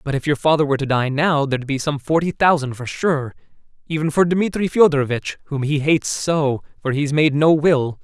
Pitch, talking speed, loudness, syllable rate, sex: 145 Hz, 210 wpm, -19 LUFS, 5.5 syllables/s, male